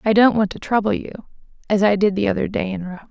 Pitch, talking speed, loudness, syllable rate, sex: 200 Hz, 250 wpm, -19 LUFS, 6.3 syllables/s, female